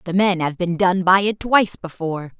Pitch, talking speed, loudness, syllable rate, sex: 185 Hz, 225 wpm, -19 LUFS, 5.3 syllables/s, female